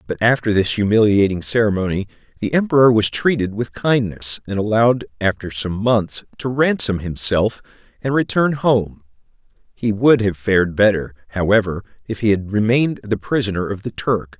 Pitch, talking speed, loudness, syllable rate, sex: 110 Hz, 155 wpm, -18 LUFS, 5.2 syllables/s, male